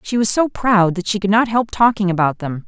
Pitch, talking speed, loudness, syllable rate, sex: 205 Hz, 270 wpm, -16 LUFS, 5.5 syllables/s, female